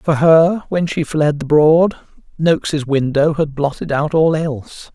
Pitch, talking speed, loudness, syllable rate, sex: 155 Hz, 170 wpm, -15 LUFS, 3.9 syllables/s, male